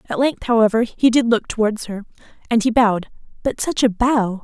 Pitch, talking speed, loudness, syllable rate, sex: 225 Hz, 190 wpm, -18 LUFS, 5.5 syllables/s, female